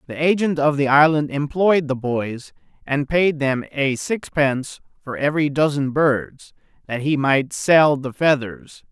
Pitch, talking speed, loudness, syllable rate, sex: 145 Hz, 155 wpm, -19 LUFS, 4.1 syllables/s, male